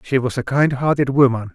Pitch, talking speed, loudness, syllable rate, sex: 130 Hz, 235 wpm, -17 LUFS, 5.5 syllables/s, male